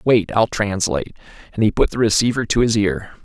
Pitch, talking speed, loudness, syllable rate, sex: 105 Hz, 205 wpm, -18 LUFS, 5.6 syllables/s, male